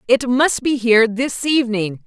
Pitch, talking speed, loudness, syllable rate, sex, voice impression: 245 Hz, 175 wpm, -17 LUFS, 4.7 syllables/s, female, very feminine, adult-like, very thin, tensed, powerful, slightly bright, slightly hard, clear, fluent, cool, intellectual, slightly refreshing, sincere, slightly calm, slightly friendly, slightly reassuring, very unique, slightly elegant, slightly wild, slightly sweet, slightly lively, slightly strict, intense